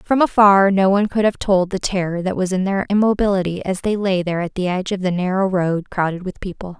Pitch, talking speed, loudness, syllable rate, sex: 190 Hz, 245 wpm, -18 LUFS, 6.0 syllables/s, female